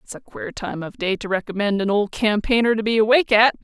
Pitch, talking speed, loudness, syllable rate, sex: 215 Hz, 245 wpm, -20 LUFS, 6.4 syllables/s, female